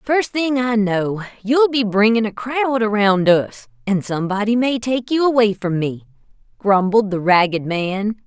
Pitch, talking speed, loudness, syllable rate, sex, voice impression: 215 Hz, 165 wpm, -18 LUFS, 4.3 syllables/s, female, feminine, adult-like, slightly tensed, fluent, slightly refreshing, friendly